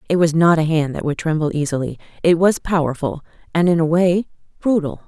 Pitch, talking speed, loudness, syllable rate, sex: 165 Hz, 200 wpm, -18 LUFS, 5.7 syllables/s, female